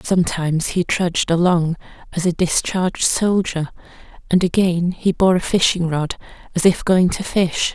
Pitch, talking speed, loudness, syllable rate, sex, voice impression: 175 Hz, 155 wpm, -18 LUFS, 4.7 syllables/s, female, very feminine, slightly gender-neutral, slightly young, slightly adult-like, thin, tensed, slightly weak, slightly bright, slightly soft, clear, fluent, slightly cute, cool, very intellectual, refreshing, very sincere, calm, very friendly, very reassuring, very elegant, slightly wild, sweet, lively, slightly strict, slightly intense